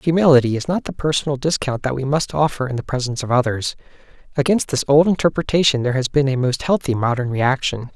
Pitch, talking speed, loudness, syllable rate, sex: 140 Hz, 195 wpm, -19 LUFS, 6.3 syllables/s, male